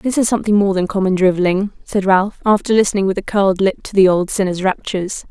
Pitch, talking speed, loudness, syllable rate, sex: 195 Hz, 225 wpm, -16 LUFS, 6.3 syllables/s, female